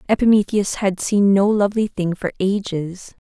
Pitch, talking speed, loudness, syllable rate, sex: 195 Hz, 145 wpm, -18 LUFS, 4.8 syllables/s, female